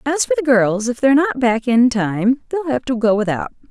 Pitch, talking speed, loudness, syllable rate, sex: 250 Hz, 245 wpm, -17 LUFS, 5.2 syllables/s, female